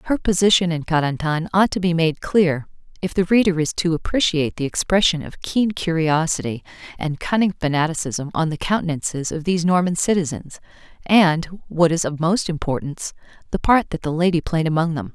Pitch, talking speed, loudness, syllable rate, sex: 170 Hz, 175 wpm, -20 LUFS, 5.5 syllables/s, female